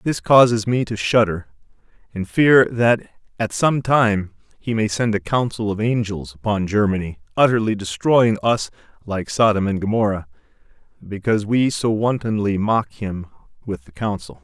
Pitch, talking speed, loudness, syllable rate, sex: 105 Hz, 150 wpm, -19 LUFS, 4.7 syllables/s, male